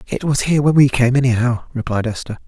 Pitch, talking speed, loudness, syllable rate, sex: 125 Hz, 220 wpm, -16 LUFS, 6.5 syllables/s, male